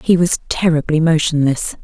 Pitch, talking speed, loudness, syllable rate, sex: 160 Hz, 130 wpm, -15 LUFS, 4.8 syllables/s, female